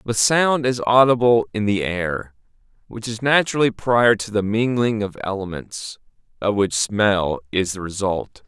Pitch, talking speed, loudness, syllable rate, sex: 105 Hz, 155 wpm, -19 LUFS, 4.3 syllables/s, male